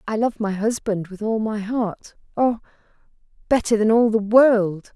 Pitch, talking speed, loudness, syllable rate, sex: 215 Hz, 160 wpm, -20 LUFS, 4.3 syllables/s, female